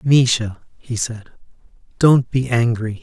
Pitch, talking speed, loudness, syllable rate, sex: 120 Hz, 120 wpm, -18 LUFS, 3.9 syllables/s, male